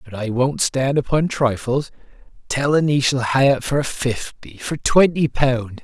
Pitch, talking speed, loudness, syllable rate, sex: 130 Hz, 145 wpm, -19 LUFS, 3.9 syllables/s, male